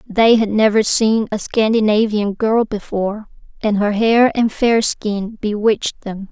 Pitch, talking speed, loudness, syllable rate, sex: 215 Hz, 150 wpm, -16 LUFS, 4.2 syllables/s, female